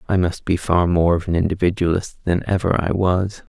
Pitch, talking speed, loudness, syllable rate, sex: 90 Hz, 200 wpm, -19 LUFS, 5.2 syllables/s, male